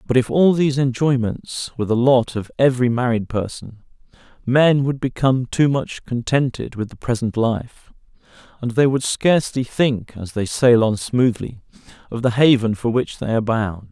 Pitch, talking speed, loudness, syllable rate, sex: 125 Hz, 170 wpm, -19 LUFS, 4.9 syllables/s, male